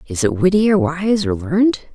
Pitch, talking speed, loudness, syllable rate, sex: 215 Hz, 215 wpm, -16 LUFS, 5.0 syllables/s, female